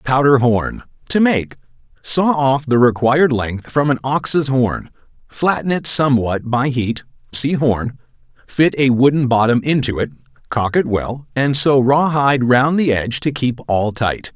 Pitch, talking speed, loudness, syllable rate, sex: 130 Hz, 165 wpm, -16 LUFS, 4.3 syllables/s, male